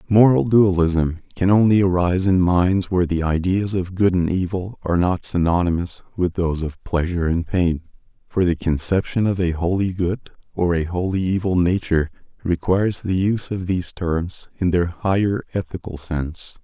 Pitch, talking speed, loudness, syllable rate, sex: 90 Hz, 165 wpm, -20 LUFS, 5.1 syllables/s, male